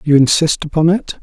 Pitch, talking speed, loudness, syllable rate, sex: 155 Hz, 195 wpm, -14 LUFS, 5.3 syllables/s, male